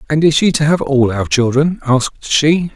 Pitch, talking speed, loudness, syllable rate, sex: 145 Hz, 220 wpm, -14 LUFS, 4.9 syllables/s, male